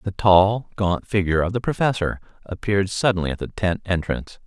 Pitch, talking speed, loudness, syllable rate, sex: 95 Hz, 175 wpm, -21 LUFS, 5.8 syllables/s, male